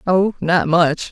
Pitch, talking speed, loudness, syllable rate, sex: 175 Hz, 160 wpm, -16 LUFS, 3.1 syllables/s, female